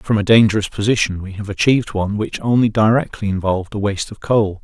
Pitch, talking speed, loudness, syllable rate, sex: 105 Hz, 205 wpm, -17 LUFS, 6.3 syllables/s, male